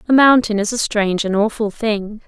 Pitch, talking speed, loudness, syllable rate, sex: 215 Hz, 210 wpm, -17 LUFS, 5.3 syllables/s, female